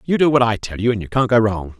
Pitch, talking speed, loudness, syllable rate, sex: 115 Hz, 365 wpm, -17 LUFS, 6.5 syllables/s, male